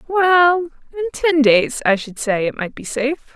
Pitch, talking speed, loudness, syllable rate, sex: 285 Hz, 180 wpm, -17 LUFS, 4.6 syllables/s, female